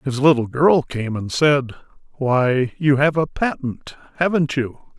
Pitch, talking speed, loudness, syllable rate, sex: 140 Hz, 155 wpm, -19 LUFS, 4.0 syllables/s, male